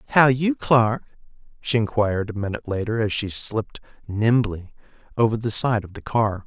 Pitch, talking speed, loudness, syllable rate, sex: 115 Hz, 165 wpm, -22 LUFS, 5.1 syllables/s, male